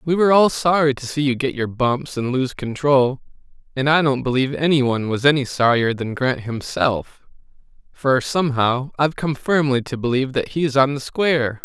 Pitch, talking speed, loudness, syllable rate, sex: 135 Hz, 190 wpm, -19 LUFS, 5.3 syllables/s, male